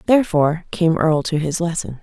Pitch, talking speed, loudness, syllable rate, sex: 165 Hz, 180 wpm, -18 LUFS, 6.0 syllables/s, female